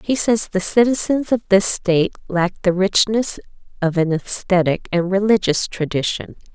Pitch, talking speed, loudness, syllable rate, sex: 195 Hz, 145 wpm, -18 LUFS, 4.7 syllables/s, female